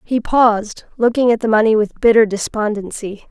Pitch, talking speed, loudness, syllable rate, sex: 220 Hz, 165 wpm, -15 LUFS, 5.1 syllables/s, female